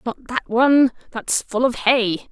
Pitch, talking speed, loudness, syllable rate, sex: 240 Hz, 155 wpm, -19 LUFS, 4.0 syllables/s, female